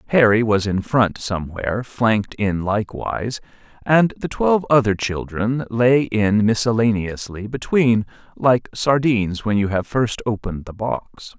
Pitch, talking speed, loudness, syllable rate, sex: 110 Hz, 135 wpm, -19 LUFS, 4.6 syllables/s, male